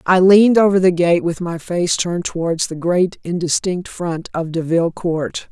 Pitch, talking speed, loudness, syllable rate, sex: 175 Hz, 185 wpm, -17 LUFS, 4.7 syllables/s, female